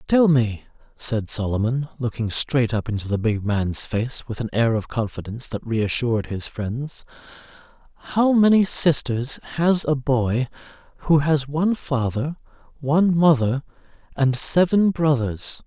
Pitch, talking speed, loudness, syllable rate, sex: 135 Hz, 140 wpm, -21 LUFS, 4.3 syllables/s, male